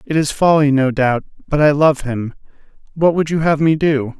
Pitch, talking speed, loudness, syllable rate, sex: 145 Hz, 215 wpm, -15 LUFS, 4.9 syllables/s, male